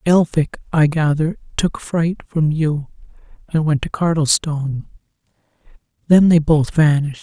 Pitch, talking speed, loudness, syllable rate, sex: 155 Hz, 115 wpm, -17 LUFS, 4.4 syllables/s, male